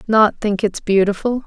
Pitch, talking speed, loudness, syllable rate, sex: 210 Hz, 165 wpm, -17 LUFS, 4.5 syllables/s, female